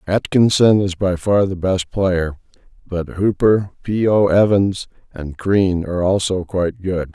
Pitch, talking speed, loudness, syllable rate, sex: 95 Hz, 150 wpm, -17 LUFS, 4.1 syllables/s, male